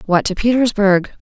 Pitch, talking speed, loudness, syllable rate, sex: 205 Hz, 145 wpm, -15 LUFS, 5.1 syllables/s, female